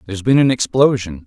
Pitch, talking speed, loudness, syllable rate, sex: 115 Hz, 190 wpm, -15 LUFS, 6.3 syllables/s, male